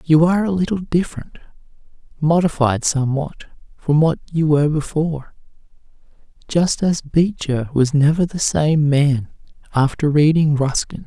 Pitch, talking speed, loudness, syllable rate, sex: 155 Hz, 115 wpm, -18 LUFS, 4.9 syllables/s, male